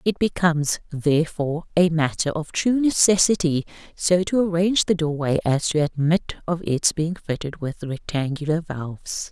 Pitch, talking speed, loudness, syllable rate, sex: 165 Hz, 150 wpm, -22 LUFS, 4.8 syllables/s, female